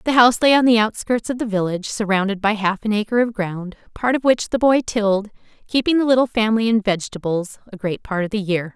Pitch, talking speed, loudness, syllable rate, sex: 215 Hz, 235 wpm, -19 LUFS, 6.1 syllables/s, female